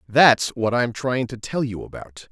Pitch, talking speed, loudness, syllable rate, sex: 120 Hz, 210 wpm, -21 LUFS, 4.3 syllables/s, male